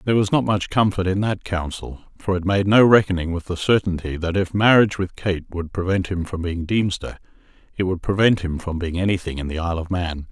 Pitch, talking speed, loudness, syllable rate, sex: 90 Hz, 225 wpm, -21 LUFS, 5.7 syllables/s, male